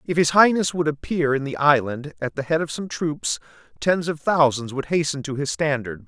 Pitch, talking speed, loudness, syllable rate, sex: 140 Hz, 215 wpm, -22 LUFS, 5.1 syllables/s, male